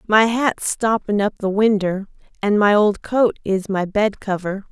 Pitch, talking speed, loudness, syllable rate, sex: 205 Hz, 180 wpm, -19 LUFS, 4.2 syllables/s, female